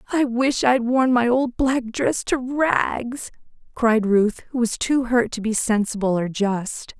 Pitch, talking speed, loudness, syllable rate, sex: 235 Hz, 180 wpm, -21 LUFS, 3.7 syllables/s, female